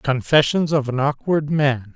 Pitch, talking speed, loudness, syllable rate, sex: 140 Hz, 155 wpm, -19 LUFS, 4.2 syllables/s, male